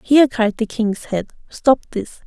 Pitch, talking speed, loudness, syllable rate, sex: 230 Hz, 185 wpm, -18 LUFS, 4.3 syllables/s, female